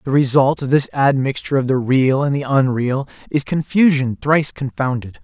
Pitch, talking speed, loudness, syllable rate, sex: 135 Hz, 170 wpm, -17 LUFS, 5.2 syllables/s, male